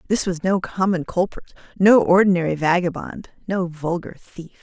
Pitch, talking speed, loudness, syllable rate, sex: 180 Hz, 145 wpm, -20 LUFS, 4.9 syllables/s, female